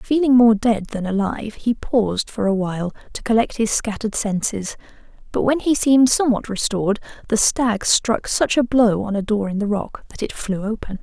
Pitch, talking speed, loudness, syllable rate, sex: 220 Hz, 200 wpm, -19 LUFS, 5.3 syllables/s, female